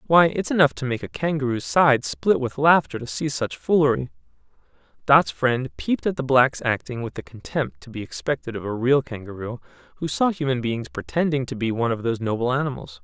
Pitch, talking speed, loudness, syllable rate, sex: 130 Hz, 200 wpm, -22 LUFS, 5.7 syllables/s, male